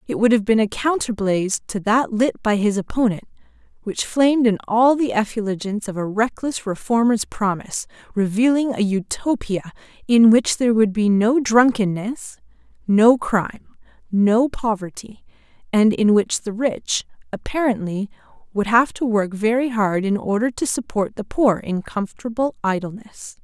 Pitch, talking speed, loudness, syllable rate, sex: 220 Hz, 150 wpm, -19 LUFS, 4.7 syllables/s, female